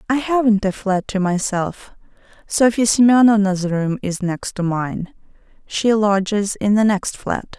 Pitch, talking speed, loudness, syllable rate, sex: 205 Hz, 140 wpm, -18 LUFS, 4.1 syllables/s, female